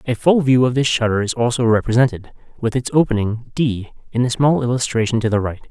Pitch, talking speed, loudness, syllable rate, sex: 120 Hz, 210 wpm, -18 LUFS, 6.1 syllables/s, male